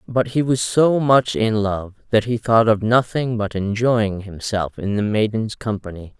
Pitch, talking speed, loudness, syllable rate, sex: 110 Hz, 185 wpm, -19 LUFS, 4.3 syllables/s, male